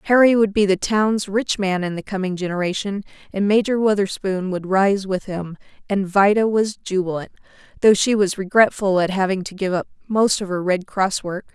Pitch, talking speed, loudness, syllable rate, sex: 195 Hz, 190 wpm, -20 LUFS, 5.1 syllables/s, female